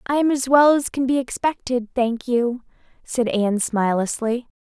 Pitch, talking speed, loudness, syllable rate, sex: 245 Hz, 155 wpm, -20 LUFS, 4.6 syllables/s, female